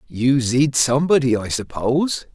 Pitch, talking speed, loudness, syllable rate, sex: 135 Hz, 130 wpm, -18 LUFS, 4.6 syllables/s, male